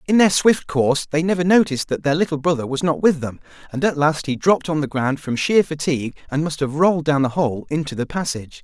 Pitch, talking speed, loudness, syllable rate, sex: 150 Hz, 250 wpm, -19 LUFS, 6.2 syllables/s, male